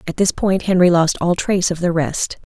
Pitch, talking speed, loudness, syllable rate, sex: 175 Hz, 240 wpm, -17 LUFS, 5.3 syllables/s, female